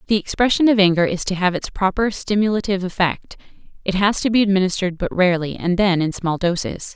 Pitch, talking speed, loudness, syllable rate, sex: 190 Hz, 205 wpm, -19 LUFS, 6.3 syllables/s, female